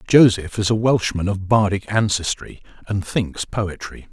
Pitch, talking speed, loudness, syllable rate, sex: 100 Hz, 145 wpm, -20 LUFS, 4.4 syllables/s, male